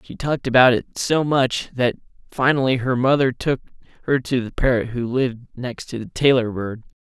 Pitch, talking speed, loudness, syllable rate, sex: 125 Hz, 190 wpm, -20 LUFS, 5.2 syllables/s, male